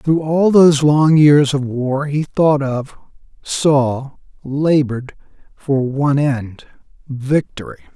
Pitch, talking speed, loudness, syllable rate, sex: 140 Hz, 115 wpm, -15 LUFS, 3.5 syllables/s, male